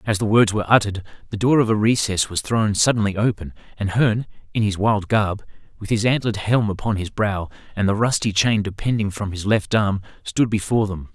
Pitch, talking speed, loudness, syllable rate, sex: 105 Hz, 210 wpm, -20 LUFS, 5.9 syllables/s, male